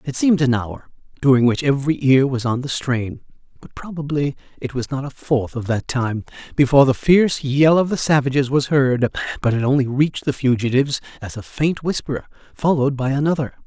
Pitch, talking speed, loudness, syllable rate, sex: 135 Hz, 195 wpm, -19 LUFS, 5.7 syllables/s, male